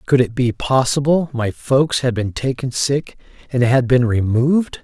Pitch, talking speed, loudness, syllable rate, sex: 130 Hz, 175 wpm, -17 LUFS, 4.4 syllables/s, male